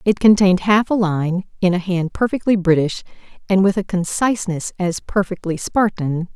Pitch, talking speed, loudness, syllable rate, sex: 190 Hz, 160 wpm, -18 LUFS, 5.0 syllables/s, female